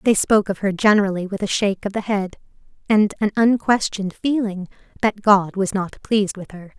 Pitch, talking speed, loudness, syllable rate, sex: 200 Hz, 195 wpm, -19 LUFS, 5.6 syllables/s, female